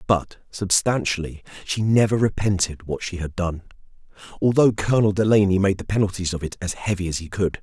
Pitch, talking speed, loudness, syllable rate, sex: 95 Hz, 175 wpm, -22 LUFS, 5.6 syllables/s, male